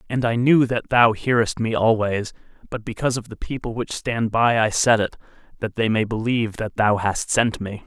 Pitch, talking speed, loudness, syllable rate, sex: 115 Hz, 215 wpm, -21 LUFS, 5.3 syllables/s, male